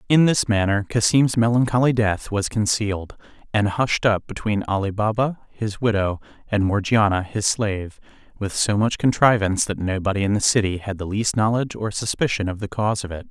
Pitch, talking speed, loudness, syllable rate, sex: 105 Hz, 180 wpm, -21 LUFS, 5.5 syllables/s, male